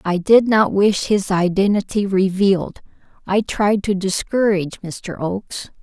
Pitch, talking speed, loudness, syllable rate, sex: 195 Hz, 135 wpm, -18 LUFS, 4.2 syllables/s, female